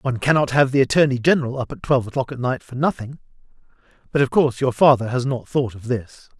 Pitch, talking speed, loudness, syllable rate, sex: 130 Hz, 215 wpm, -20 LUFS, 6.6 syllables/s, male